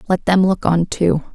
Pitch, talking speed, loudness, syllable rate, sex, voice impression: 175 Hz, 220 wpm, -16 LUFS, 4.5 syllables/s, female, feminine, adult-like, relaxed, weak, soft, raspy, intellectual, calm, reassuring, elegant, slightly sharp, modest